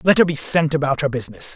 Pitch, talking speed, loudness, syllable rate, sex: 150 Hz, 270 wpm, -18 LUFS, 6.9 syllables/s, male